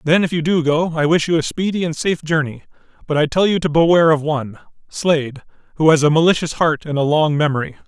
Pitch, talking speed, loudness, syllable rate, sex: 155 Hz, 235 wpm, -17 LUFS, 6.4 syllables/s, male